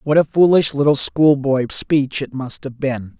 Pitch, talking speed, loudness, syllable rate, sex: 140 Hz, 205 wpm, -17 LUFS, 4.3 syllables/s, male